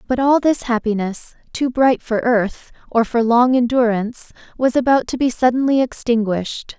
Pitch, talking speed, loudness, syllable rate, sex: 240 Hz, 160 wpm, -17 LUFS, 4.8 syllables/s, female